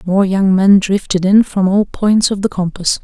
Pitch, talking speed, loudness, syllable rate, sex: 195 Hz, 220 wpm, -13 LUFS, 4.5 syllables/s, female